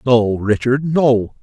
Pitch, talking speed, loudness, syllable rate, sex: 120 Hz, 125 wpm, -16 LUFS, 3.2 syllables/s, male